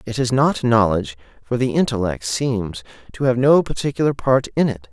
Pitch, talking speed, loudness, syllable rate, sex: 120 Hz, 185 wpm, -19 LUFS, 5.3 syllables/s, male